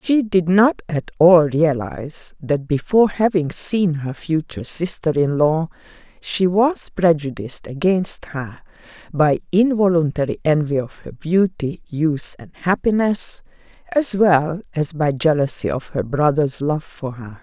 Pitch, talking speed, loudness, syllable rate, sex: 165 Hz, 140 wpm, -19 LUFS, 4.1 syllables/s, female